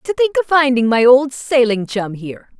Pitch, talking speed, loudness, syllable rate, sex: 260 Hz, 210 wpm, -14 LUFS, 5.0 syllables/s, female